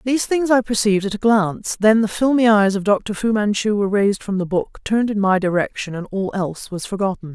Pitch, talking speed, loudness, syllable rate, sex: 205 Hz, 235 wpm, -19 LUFS, 6.0 syllables/s, female